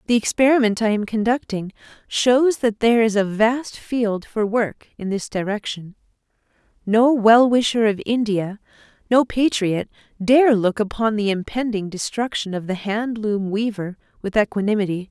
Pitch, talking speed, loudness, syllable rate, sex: 215 Hz, 145 wpm, -20 LUFS, 4.6 syllables/s, female